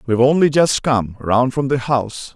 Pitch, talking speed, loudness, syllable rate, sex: 130 Hz, 180 wpm, -17 LUFS, 5.1 syllables/s, male